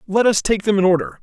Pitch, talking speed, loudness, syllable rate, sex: 195 Hz, 295 wpm, -17 LUFS, 6.5 syllables/s, male